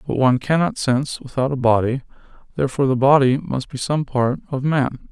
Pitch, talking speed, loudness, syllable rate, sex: 135 Hz, 190 wpm, -19 LUFS, 5.8 syllables/s, male